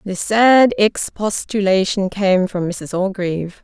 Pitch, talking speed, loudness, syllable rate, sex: 195 Hz, 115 wpm, -17 LUFS, 3.7 syllables/s, female